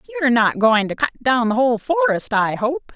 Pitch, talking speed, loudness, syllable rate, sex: 225 Hz, 225 wpm, -18 LUFS, 5.8 syllables/s, female